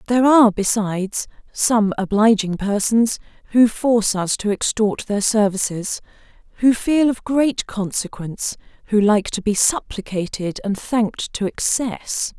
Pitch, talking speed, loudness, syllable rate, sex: 215 Hz, 130 wpm, -19 LUFS, 4.4 syllables/s, female